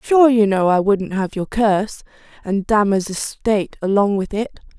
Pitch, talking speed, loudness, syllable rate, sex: 205 Hz, 175 wpm, -18 LUFS, 4.8 syllables/s, female